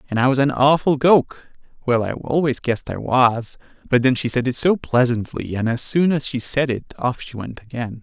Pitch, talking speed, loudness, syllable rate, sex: 130 Hz, 225 wpm, -19 LUFS, 5.1 syllables/s, male